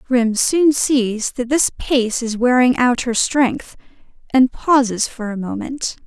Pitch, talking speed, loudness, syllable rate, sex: 245 Hz, 160 wpm, -17 LUFS, 3.6 syllables/s, female